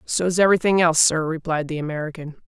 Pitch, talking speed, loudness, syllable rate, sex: 165 Hz, 170 wpm, -20 LUFS, 6.5 syllables/s, female